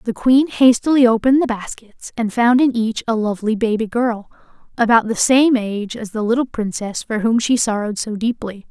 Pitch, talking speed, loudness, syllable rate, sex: 230 Hz, 195 wpm, -17 LUFS, 5.4 syllables/s, female